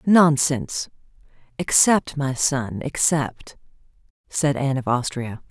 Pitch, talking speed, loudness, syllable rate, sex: 140 Hz, 100 wpm, -21 LUFS, 3.8 syllables/s, female